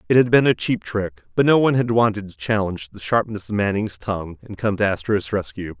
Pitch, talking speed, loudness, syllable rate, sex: 105 Hz, 240 wpm, -20 LUFS, 5.9 syllables/s, male